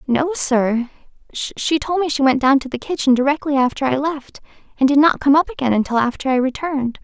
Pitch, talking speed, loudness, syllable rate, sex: 275 Hz, 215 wpm, -18 LUFS, 5.6 syllables/s, female